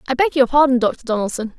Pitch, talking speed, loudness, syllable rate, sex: 255 Hz, 225 wpm, -17 LUFS, 6.7 syllables/s, female